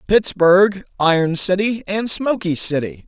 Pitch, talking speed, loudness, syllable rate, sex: 185 Hz, 115 wpm, -17 LUFS, 4.0 syllables/s, male